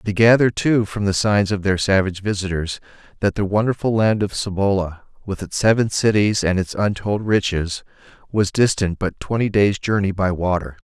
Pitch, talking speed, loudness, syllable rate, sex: 100 Hz, 175 wpm, -19 LUFS, 5.2 syllables/s, male